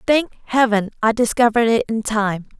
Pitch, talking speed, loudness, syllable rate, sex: 230 Hz, 160 wpm, -18 LUFS, 5.2 syllables/s, female